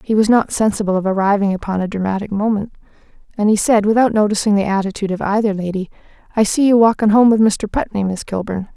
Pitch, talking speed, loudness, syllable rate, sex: 205 Hz, 205 wpm, -16 LUFS, 6.7 syllables/s, female